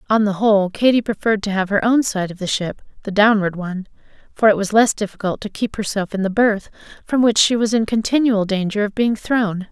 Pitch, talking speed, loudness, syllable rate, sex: 210 Hz, 230 wpm, -18 LUFS, 5.8 syllables/s, female